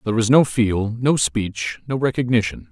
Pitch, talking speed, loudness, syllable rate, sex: 115 Hz, 175 wpm, -19 LUFS, 4.8 syllables/s, male